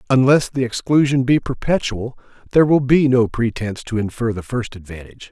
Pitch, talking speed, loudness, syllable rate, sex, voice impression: 125 Hz, 170 wpm, -18 LUFS, 5.7 syllables/s, male, masculine, adult-like, tensed, powerful, hard, raspy, cool, mature, wild, lively, slightly strict, slightly intense